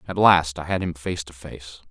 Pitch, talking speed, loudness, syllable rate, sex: 80 Hz, 250 wpm, -22 LUFS, 4.8 syllables/s, male